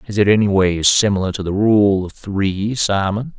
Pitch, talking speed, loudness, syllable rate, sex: 100 Hz, 195 wpm, -16 LUFS, 4.7 syllables/s, male